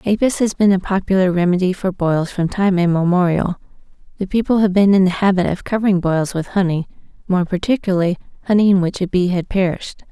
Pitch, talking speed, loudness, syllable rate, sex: 185 Hz, 190 wpm, -17 LUFS, 6.1 syllables/s, female